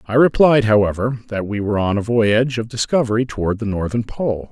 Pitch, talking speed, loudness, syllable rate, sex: 115 Hz, 200 wpm, -18 LUFS, 5.9 syllables/s, male